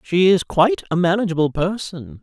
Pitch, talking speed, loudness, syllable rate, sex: 170 Hz, 160 wpm, -18 LUFS, 5.3 syllables/s, male